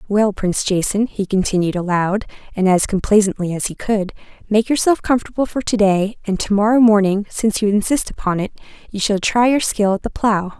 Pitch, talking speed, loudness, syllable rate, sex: 205 Hz, 200 wpm, -17 LUFS, 5.6 syllables/s, female